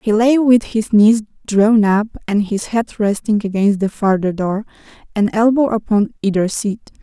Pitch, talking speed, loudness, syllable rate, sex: 215 Hz, 170 wpm, -16 LUFS, 4.5 syllables/s, female